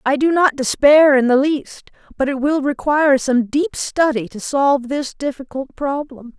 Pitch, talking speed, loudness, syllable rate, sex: 275 Hz, 180 wpm, -17 LUFS, 4.5 syllables/s, female